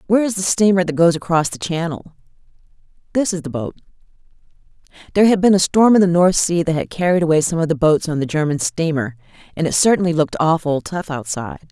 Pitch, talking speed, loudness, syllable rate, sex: 165 Hz, 210 wpm, -17 LUFS, 6.5 syllables/s, female